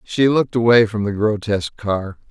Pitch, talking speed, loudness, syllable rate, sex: 110 Hz, 180 wpm, -18 LUFS, 5.2 syllables/s, male